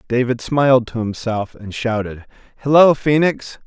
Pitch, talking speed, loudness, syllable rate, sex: 120 Hz, 130 wpm, -17 LUFS, 4.5 syllables/s, male